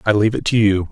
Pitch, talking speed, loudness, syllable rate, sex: 105 Hz, 330 wpm, -16 LUFS, 7.6 syllables/s, male